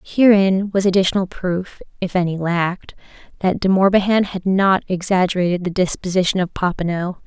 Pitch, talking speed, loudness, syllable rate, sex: 185 Hz, 140 wpm, -18 LUFS, 5.3 syllables/s, female